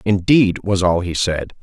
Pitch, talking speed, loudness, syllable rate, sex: 95 Hz, 185 wpm, -17 LUFS, 4.1 syllables/s, male